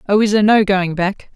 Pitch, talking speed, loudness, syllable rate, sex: 200 Hz, 265 wpm, -15 LUFS, 6.0 syllables/s, female